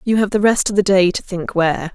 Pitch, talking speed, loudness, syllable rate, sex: 195 Hz, 310 wpm, -16 LUFS, 6.0 syllables/s, female